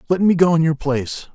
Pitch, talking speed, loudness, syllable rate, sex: 160 Hz, 270 wpm, -17 LUFS, 6.2 syllables/s, male